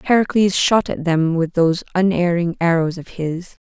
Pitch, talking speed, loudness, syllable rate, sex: 175 Hz, 165 wpm, -18 LUFS, 4.9 syllables/s, female